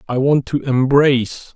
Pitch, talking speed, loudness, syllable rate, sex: 135 Hz, 155 wpm, -16 LUFS, 4.3 syllables/s, male